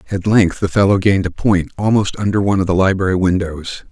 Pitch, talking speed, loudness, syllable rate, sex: 95 Hz, 215 wpm, -15 LUFS, 6.1 syllables/s, male